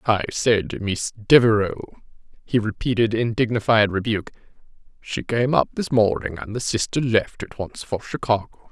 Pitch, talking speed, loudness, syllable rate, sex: 110 Hz, 150 wpm, -21 LUFS, 5.1 syllables/s, male